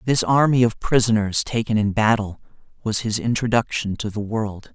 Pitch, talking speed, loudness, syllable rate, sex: 110 Hz, 165 wpm, -20 LUFS, 5.0 syllables/s, male